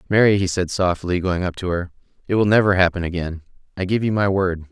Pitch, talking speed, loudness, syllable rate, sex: 95 Hz, 230 wpm, -20 LUFS, 6.2 syllables/s, male